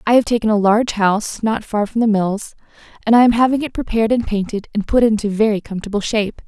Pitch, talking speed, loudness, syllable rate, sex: 215 Hz, 230 wpm, -17 LUFS, 6.5 syllables/s, female